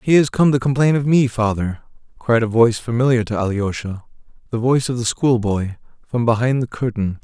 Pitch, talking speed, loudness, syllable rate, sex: 120 Hz, 175 wpm, -18 LUFS, 5.7 syllables/s, male